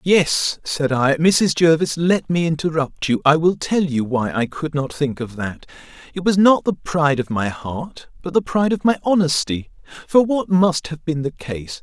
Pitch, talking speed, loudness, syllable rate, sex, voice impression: 160 Hz, 210 wpm, -19 LUFS, 4.5 syllables/s, male, masculine, adult-like, slightly clear, slightly refreshing, friendly, slightly lively